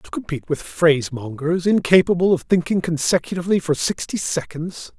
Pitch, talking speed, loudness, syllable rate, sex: 165 Hz, 130 wpm, -20 LUFS, 5.5 syllables/s, male